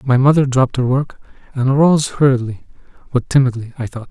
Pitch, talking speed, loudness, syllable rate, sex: 130 Hz, 175 wpm, -16 LUFS, 6.4 syllables/s, male